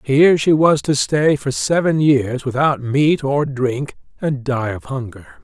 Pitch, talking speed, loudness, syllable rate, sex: 140 Hz, 175 wpm, -17 LUFS, 4.1 syllables/s, male